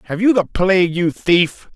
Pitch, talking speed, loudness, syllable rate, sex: 180 Hz, 205 wpm, -16 LUFS, 4.6 syllables/s, male